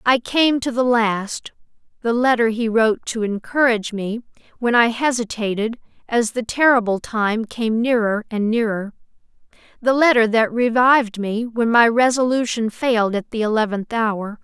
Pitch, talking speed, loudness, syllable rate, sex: 230 Hz, 145 wpm, -19 LUFS, 4.7 syllables/s, female